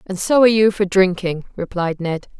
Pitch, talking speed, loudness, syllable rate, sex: 190 Hz, 200 wpm, -17 LUFS, 5.3 syllables/s, female